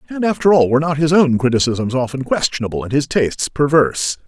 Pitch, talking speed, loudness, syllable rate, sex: 140 Hz, 195 wpm, -16 LUFS, 6.2 syllables/s, male